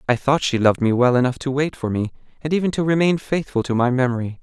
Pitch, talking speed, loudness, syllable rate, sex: 135 Hz, 260 wpm, -20 LUFS, 6.5 syllables/s, male